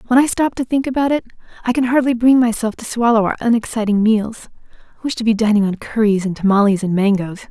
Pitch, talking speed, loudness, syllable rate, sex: 225 Hz, 225 wpm, -16 LUFS, 6.4 syllables/s, female